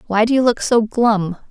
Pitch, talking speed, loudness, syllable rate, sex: 220 Hz, 240 wpm, -16 LUFS, 4.9 syllables/s, female